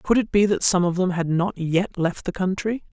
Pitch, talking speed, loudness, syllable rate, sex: 185 Hz, 260 wpm, -22 LUFS, 5.0 syllables/s, female